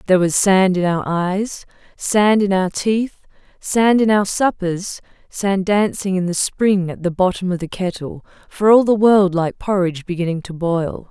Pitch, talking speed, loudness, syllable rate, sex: 190 Hz, 185 wpm, -17 LUFS, 4.4 syllables/s, female